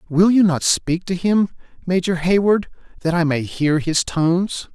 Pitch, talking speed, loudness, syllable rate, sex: 175 Hz, 175 wpm, -18 LUFS, 4.3 syllables/s, male